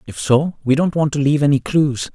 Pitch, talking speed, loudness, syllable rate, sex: 145 Hz, 250 wpm, -17 LUFS, 5.7 syllables/s, male